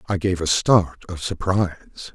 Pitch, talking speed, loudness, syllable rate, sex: 90 Hz, 170 wpm, -21 LUFS, 5.5 syllables/s, male